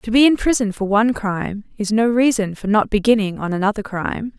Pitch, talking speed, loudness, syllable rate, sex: 215 Hz, 220 wpm, -18 LUFS, 6.0 syllables/s, female